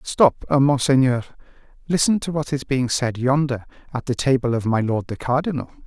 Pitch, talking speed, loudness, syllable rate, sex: 135 Hz, 175 wpm, -21 LUFS, 5.0 syllables/s, male